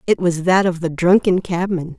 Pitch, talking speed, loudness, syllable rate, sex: 175 Hz, 210 wpm, -17 LUFS, 4.9 syllables/s, female